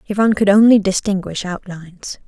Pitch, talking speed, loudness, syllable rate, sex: 195 Hz, 130 wpm, -15 LUFS, 5.8 syllables/s, female